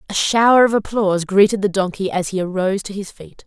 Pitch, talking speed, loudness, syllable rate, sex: 195 Hz, 225 wpm, -17 LUFS, 6.1 syllables/s, female